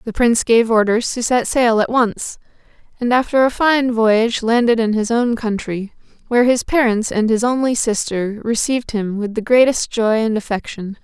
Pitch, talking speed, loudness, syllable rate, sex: 230 Hz, 185 wpm, -16 LUFS, 4.9 syllables/s, female